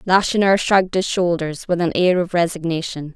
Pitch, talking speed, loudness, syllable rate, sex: 175 Hz, 170 wpm, -18 LUFS, 5.3 syllables/s, female